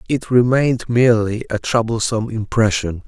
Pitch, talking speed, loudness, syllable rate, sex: 115 Hz, 115 wpm, -17 LUFS, 5.3 syllables/s, male